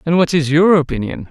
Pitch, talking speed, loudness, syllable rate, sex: 160 Hz, 230 wpm, -14 LUFS, 5.9 syllables/s, male